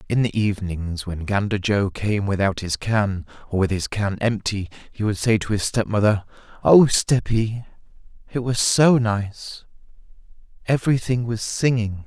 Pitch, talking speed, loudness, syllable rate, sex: 105 Hz, 150 wpm, -21 LUFS, 4.5 syllables/s, male